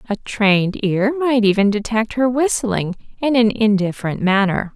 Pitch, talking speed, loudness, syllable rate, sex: 220 Hz, 150 wpm, -17 LUFS, 4.6 syllables/s, female